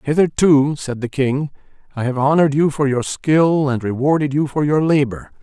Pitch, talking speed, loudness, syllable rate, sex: 145 Hz, 190 wpm, -17 LUFS, 5.0 syllables/s, male